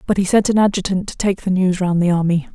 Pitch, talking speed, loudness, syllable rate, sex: 185 Hz, 285 wpm, -17 LUFS, 6.3 syllables/s, female